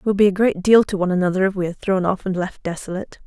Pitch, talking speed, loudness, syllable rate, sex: 190 Hz, 295 wpm, -19 LUFS, 7.4 syllables/s, female